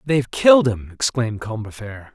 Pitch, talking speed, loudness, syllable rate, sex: 120 Hz, 170 wpm, -19 LUFS, 6.3 syllables/s, male